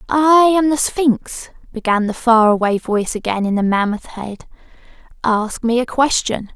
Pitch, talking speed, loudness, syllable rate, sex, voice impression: 235 Hz, 165 wpm, -16 LUFS, 4.4 syllables/s, female, very feminine, young, very thin, very tensed, powerful, very bright, hard, very clear, very fluent, very cute, slightly cool, intellectual, very refreshing, sincere, slightly calm, very friendly, very reassuring, unique, elegant, slightly wild, very sweet, very lively, intense, slightly sharp